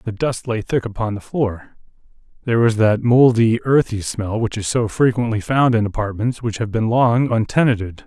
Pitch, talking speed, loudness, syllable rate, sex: 115 Hz, 180 wpm, -18 LUFS, 5.0 syllables/s, male